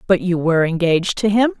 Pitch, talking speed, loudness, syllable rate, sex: 190 Hz, 225 wpm, -17 LUFS, 6.5 syllables/s, female